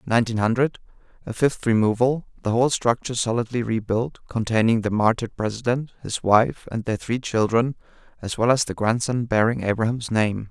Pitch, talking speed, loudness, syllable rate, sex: 115 Hz, 155 wpm, -22 LUFS, 5.5 syllables/s, male